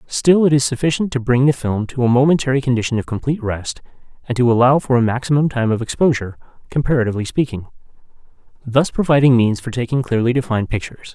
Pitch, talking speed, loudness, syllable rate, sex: 125 Hz, 185 wpm, -17 LUFS, 6.8 syllables/s, male